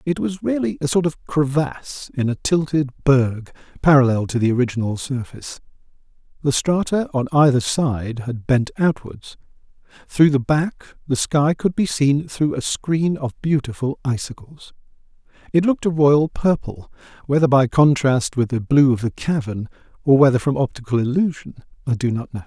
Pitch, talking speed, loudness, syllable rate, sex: 140 Hz, 160 wpm, -19 LUFS, 4.9 syllables/s, male